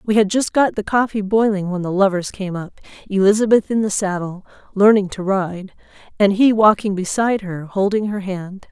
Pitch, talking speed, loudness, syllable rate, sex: 200 Hz, 185 wpm, -18 LUFS, 5.2 syllables/s, female